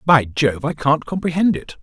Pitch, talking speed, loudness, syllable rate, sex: 150 Hz, 195 wpm, -18 LUFS, 4.7 syllables/s, male